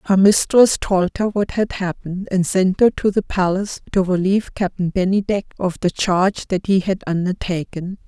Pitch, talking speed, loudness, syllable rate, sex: 190 Hz, 180 wpm, -19 LUFS, 5.2 syllables/s, female